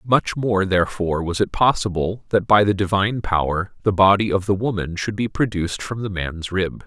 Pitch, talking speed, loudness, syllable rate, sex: 100 Hz, 200 wpm, -20 LUFS, 5.3 syllables/s, male